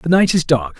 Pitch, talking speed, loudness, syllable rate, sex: 150 Hz, 300 wpm, -15 LUFS, 5.4 syllables/s, male